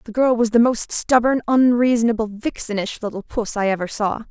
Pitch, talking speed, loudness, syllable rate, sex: 225 Hz, 180 wpm, -19 LUFS, 5.4 syllables/s, female